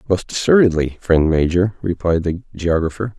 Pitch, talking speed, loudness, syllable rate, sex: 90 Hz, 130 wpm, -17 LUFS, 5.0 syllables/s, male